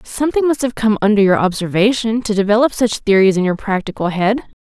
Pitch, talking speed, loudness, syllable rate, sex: 215 Hz, 195 wpm, -15 LUFS, 6.0 syllables/s, female